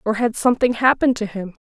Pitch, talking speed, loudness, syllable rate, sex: 230 Hz, 215 wpm, -18 LUFS, 6.9 syllables/s, female